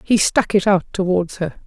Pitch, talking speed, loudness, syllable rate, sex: 190 Hz, 215 wpm, -18 LUFS, 4.7 syllables/s, female